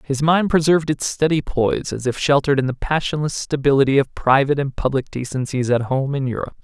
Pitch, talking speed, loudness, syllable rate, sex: 140 Hz, 200 wpm, -19 LUFS, 6.2 syllables/s, male